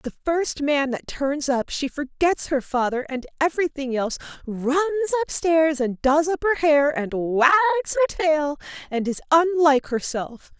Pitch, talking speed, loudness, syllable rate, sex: 300 Hz, 155 wpm, -22 LUFS, 4.4 syllables/s, female